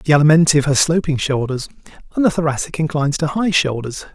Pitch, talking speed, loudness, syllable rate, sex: 150 Hz, 175 wpm, -17 LUFS, 6.4 syllables/s, male